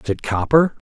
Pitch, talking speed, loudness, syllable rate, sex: 130 Hz, 200 wpm, -18 LUFS, 5.7 syllables/s, male